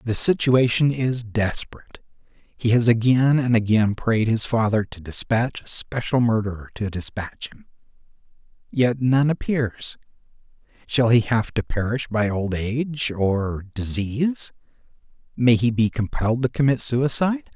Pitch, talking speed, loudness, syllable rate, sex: 120 Hz, 135 wpm, -21 LUFS, 4.4 syllables/s, male